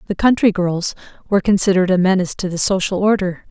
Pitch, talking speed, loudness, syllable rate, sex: 190 Hz, 190 wpm, -17 LUFS, 6.7 syllables/s, female